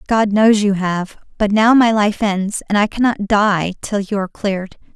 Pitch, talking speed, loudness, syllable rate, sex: 205 Hz, 205 wpm, -16 LUFS, 4.7 syllables/s, female